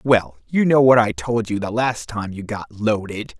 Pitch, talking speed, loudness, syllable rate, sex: 115 Hz, 230 wpm, -20 LUFS, 4.5 syllables/s, male